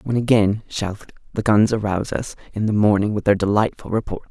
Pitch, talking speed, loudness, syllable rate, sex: 105 Hz, 195 wpm, -20 LUFS, 5.9 syllables/s, male